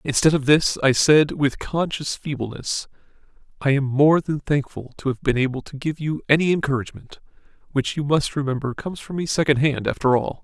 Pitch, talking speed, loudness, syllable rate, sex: 145 Hz, 180 wpm, -21 LUFS, 5.4 syllables/s, male